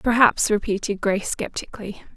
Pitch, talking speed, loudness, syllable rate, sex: 210 Hz, 110 wpm, -22 LUFS, 5.8 syllables/s, female